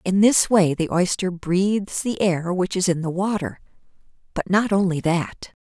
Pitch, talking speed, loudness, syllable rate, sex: 185 Hz, 180 wpm, -21 LUFS, 4.4 syllables/s, female